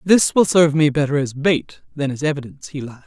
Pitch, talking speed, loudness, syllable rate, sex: 145 Hz, 235 wpm, -18 LUFS, 6.3 syllables/s, female